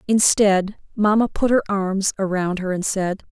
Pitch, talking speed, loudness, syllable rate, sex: 200 Hz, 165 wpm, -20 LUFS, 4.3 syllables/s, female